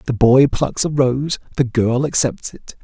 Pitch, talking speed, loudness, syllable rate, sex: 130 Hz, 190 wpm, -17 LUFS, 4.1 syllables/s, male